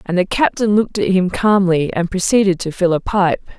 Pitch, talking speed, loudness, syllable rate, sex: 190 Hz, 215 wpm, -16 LUFS, 5.4 syllables/s, female